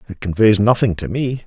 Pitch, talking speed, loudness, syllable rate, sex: 105 Hz, 205 wpm, -17 LUFS, 5.7 syllables/s, male